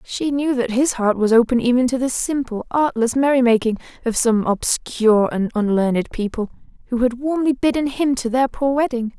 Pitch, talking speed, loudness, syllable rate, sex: 245 Hz, 185 wpm, -19 LUFS, 5.2 syllables/s, female